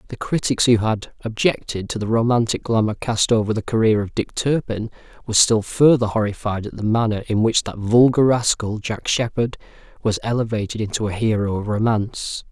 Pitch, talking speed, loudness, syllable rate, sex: 110 Hz, 175 wpm, -20 LUFS, 5.4 syllables/s, male